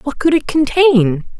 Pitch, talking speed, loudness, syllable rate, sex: 270 Hz, 170 wpm, -13 LUFS, 4.0 syllables/s, female